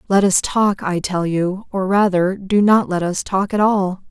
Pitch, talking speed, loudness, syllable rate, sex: 190 Hz, 220 wpm, -17 LUFS, 4.2 syllables/s, female